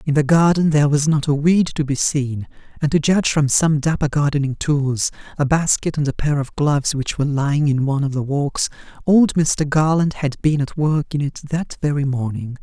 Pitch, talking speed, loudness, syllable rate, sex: 145 Hz, 220 wpm, -18 LUFS, 5.2 syllables/s, male